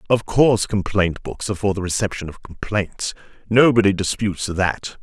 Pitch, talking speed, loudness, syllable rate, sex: 100 Hz, 145 wpm, -20 LUFS, 5.2 syllables/s, male